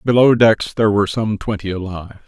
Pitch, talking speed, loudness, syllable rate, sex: 105 Hz, 185 wpm, -16 LUFS, 6.2 syllables/s, male